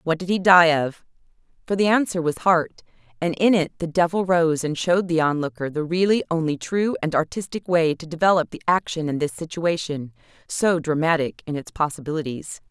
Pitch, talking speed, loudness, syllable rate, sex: 165 Hz, 185 wpm, -22 LUFS, 5.4 syllables/s, female